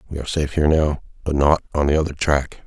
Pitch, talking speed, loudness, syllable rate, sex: 75 Hz, 250 wpm, -20 LUFS, 7.0 syllables/s, male